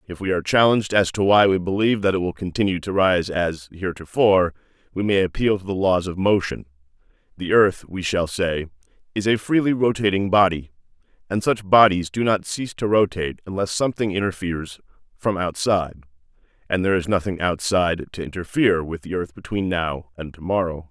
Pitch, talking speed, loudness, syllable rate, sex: 95 Hz, 180 wpm, -21 LUFS, 5.8 syllables/s, male